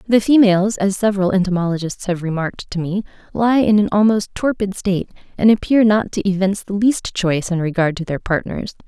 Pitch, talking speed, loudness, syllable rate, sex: 195 Hz, 190 wpm, -17 LUFS, 5.9 syllables/s, female